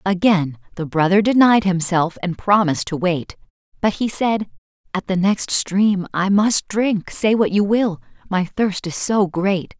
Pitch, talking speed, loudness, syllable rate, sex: 195 Hz, 170 wpm, -18 LUFS, 4.1 syllables/s, female